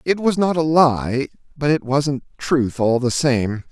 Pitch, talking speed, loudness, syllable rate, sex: 140 Hz, 180 wpm, -19 LUFS, 3.8 syllables/s, male